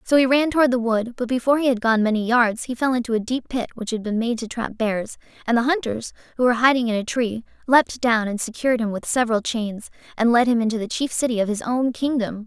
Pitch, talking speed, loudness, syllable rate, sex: 235 Hz, 260 wpm, -21 LUFS, 6.2 syllables/s, female